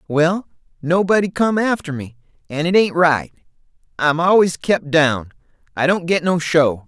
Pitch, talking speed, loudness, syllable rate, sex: 165 Hz, 155 wpm, -17 LUFS, 4.3 syllables/s, male